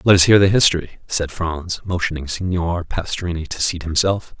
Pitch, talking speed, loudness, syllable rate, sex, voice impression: 85 Hz, 175 wpm, -19 LUFS, 5.1 syllables/s, male, masculine, very adult-like, slightly thick, cool, slightly sincere, slightly wild